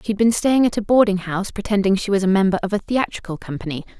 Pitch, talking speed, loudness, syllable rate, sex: 200 Hz, 240 wpm, -19 LUFS, 6.7 syllables/s, female